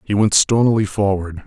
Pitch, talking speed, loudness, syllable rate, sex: 100 Hz, 165 wpm, -16 LUFS, 5.2 syllables/s, male